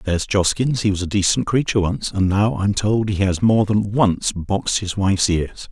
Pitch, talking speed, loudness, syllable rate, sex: 100 Hz, 220 wpm, -19 LUFS, 5.1 syllables/s, male